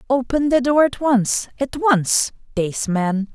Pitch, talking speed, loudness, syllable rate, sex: 245 Hz, 160 wpm, -19 LUFS, 3.6 syllables/s, female